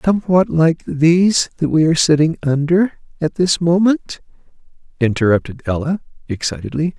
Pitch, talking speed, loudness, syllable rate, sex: 155 Hz, 120 wpm, -16 LUFS, 5.1 syllables/s, male